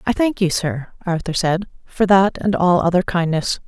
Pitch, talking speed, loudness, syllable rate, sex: 180 Hz, 195 wpm, -18 LUFS, 4.8 syllables/s, female